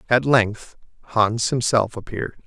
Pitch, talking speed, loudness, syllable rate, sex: 110 Hz, 120 wpm, -21 LUFS, 4.4 syllables/s, male